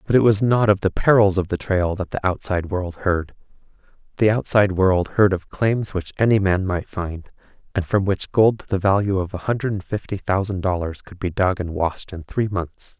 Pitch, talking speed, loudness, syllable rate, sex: 95 Hz, 220 wpm, -21 LUFS, 5.1 syllables/s, male